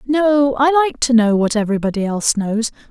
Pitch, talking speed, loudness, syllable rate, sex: 245 Hz, 185 wpm, -16 LUFS, 5.4 syllables/s, female